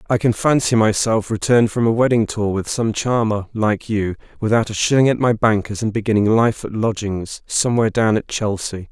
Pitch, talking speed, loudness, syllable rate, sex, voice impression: 110 Hz, 195 wpm, -18 LUFS, 5.4 syllables/s, male, masculine, adult-like, slightly dark, sincere, calm